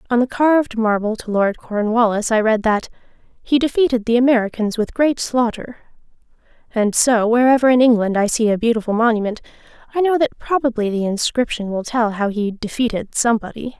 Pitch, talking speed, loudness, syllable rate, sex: 230 Hz, 170 wpm, -18 LUFS, 5.7 syllables/s, female